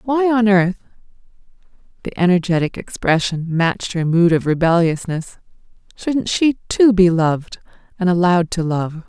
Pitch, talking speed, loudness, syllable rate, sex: 185 Hz, 120 wpm, -17 LUFS, 4.8 syllables/s, female